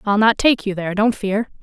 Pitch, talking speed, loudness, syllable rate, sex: 210 Hz, 260 wpm, -18 LUFS, 5.6 syllables/s, female